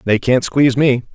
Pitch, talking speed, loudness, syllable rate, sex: 125 Hz, 210 wpm, -14 LUFS, 5.2 syllables/s, male